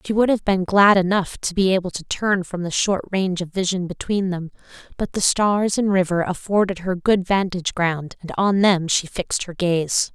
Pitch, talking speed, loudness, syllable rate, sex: 185 Hz, 215 wpm, -20 LUFS, 4.9 syllables/s, female